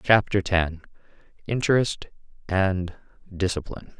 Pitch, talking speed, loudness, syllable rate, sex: 95 Hz, 75 wpm, -24 LUFS, 4.2 syllables/s, male